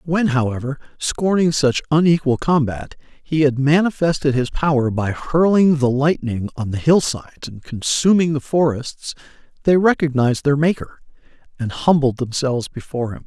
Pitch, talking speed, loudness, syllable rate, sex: 145 Hz, 145 wpm, -18 LUFS, 4.9 syllables/s, male